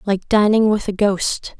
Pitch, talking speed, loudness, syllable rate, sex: 205 Hz, 190 wpm, -17 LUFS, 4.1 syllables/s, female